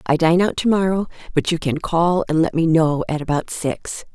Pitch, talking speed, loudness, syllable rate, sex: 165 Hz, 230 wpm, -19 LUFS, 4.9 syllables/s, female